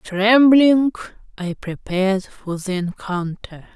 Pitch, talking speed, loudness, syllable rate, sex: 205 Hz, 95 wpm, -18 LUFS, 3.7 syllables/s, female